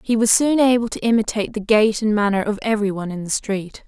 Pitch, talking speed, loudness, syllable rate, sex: 215 Hz, 230 wpm, -19 LUFS, 6.2 syllables/s, female